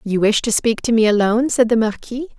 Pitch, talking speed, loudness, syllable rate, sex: 225 Hz, 250 wpm, -16 LUFS, 5.9 syllables/s, female